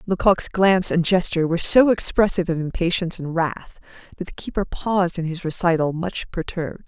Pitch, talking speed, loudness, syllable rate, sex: 175 Hz, 175 wpm, -20 LUFS, 5.9 syllables/s, female